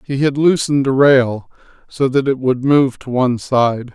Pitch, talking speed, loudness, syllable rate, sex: 130 Hz, 200 wpm, -15 LUFS, 4.7 syllables/s, male